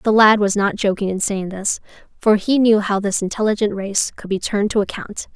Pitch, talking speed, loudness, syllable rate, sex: 205 Hz, 225 wpm, -18 LUFS, 5.4 syllables/s, female